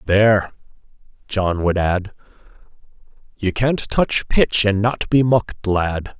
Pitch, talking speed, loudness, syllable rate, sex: 105 Hz, 125 wpm, -18 LUFS, 3.7 syllables/s, male